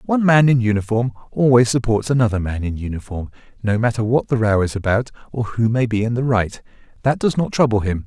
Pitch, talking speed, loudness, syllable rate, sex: 115 Hz, 210 wpm, -18 LUFS, 6.0 syllables/s, male